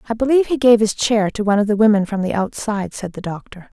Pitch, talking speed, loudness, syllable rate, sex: 215 Hz, 270 wpm, -17 LUFS, 6.7 syllables/s, female